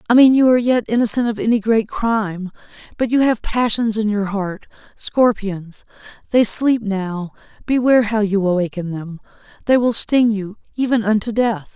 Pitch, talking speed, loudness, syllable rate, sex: 220 Hz, 150 wpm, -17 LUFS, 4.9 syllables/s, female